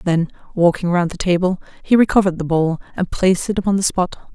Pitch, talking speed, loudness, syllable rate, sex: 180 Hz, 205 wpm, -18 LUFS, 6.3 syllables/s, female